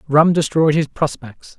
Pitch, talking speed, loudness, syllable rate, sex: 150 Hz, 150 wpm, -17 LUFS, 4.2 syllables/s, male